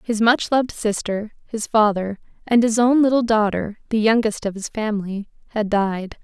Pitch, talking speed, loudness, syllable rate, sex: 215 Hz, 175 wpm, -20 LUFS, 4.9 syllables/s, female